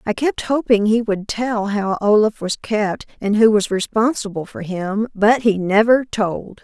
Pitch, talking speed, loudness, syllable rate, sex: 215 Hz, 180 wpm, -18 LUFS, 4.1 syllables/s, female